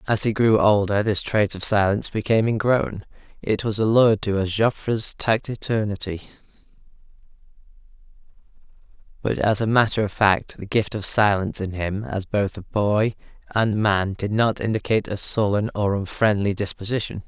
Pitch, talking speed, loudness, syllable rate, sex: 105 Hz, 145 wpm, -21 LUFS, 5.0 syllables/s, male